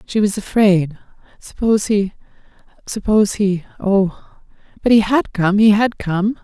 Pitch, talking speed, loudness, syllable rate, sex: 205 Hz, 120 wpm, -16 LUFS, 4.3 syllables/s, female